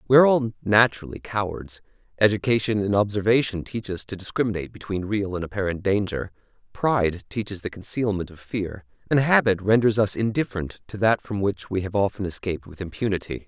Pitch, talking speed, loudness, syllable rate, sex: 100 Hz, 170 wpm, -24 LUFS, 5.9 syllables/s, male